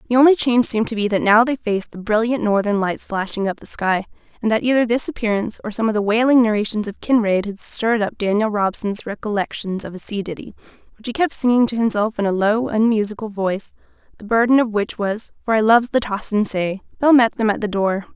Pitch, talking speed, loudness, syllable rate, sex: 215 Hz, 230 wpm, -19 LUFS, 6.1 syllables/s, female